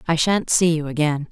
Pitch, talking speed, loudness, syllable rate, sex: 160 Hz, 230 wpm, -19 LUFS, 5.2 syllables/s, female